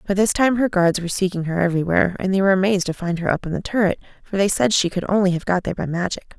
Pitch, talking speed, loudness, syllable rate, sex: 185 Hz, 290 wpm, -20 LUFS, 7.4 syllables/s, female